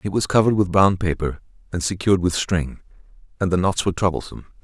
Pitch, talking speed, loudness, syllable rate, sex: 90 Hz, 195 wpm, -21 LUFS, 6.9 syllables/s, male